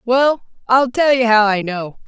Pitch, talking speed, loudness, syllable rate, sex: 235 Hz, 200 wpm, -15 LUFS, 4.1 syllables/s, female